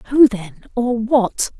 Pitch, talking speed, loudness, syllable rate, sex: 240 Hz, 150 wpm, -17 LUFS, 2.8 syllables/s, female